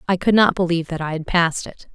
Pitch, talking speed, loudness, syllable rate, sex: 170 Hz, 280 wpm, -19 LUFS, 6.8 syllables/s, female